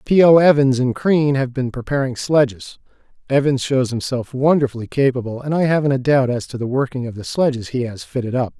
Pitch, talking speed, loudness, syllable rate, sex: 130 Hz, 210 wpm, -18 LUFS, 5.7 syllables/s, male